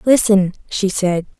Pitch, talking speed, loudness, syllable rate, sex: 200 Hz, 130 wpm, -16 LUFS, 3.9 syllables/s, female